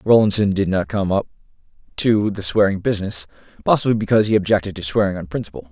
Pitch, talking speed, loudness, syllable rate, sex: 100 Hz, 180 wpm, -19 LUFS, 6.7 syllables/s, male